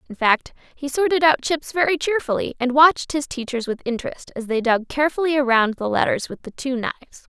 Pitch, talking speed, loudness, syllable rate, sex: 270 Hz, 205 wpm, -20 LUFS, 6.1 syllables/s, female